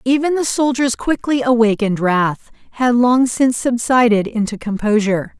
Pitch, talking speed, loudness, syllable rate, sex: 235 Hz, 135 wpm, -16 LUFS, 5.0 syllables/s, female